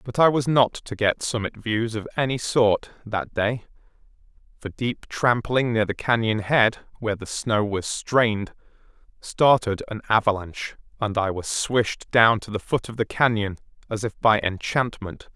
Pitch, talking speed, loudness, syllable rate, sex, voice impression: 110 Hz, 170 wpm, -23 LUFS, 4.5 syllables/s, male, masculine, adult-like, tensed, slightly bright, fluent, cool, friendly, wild, lively, slightly strict, slightly sharp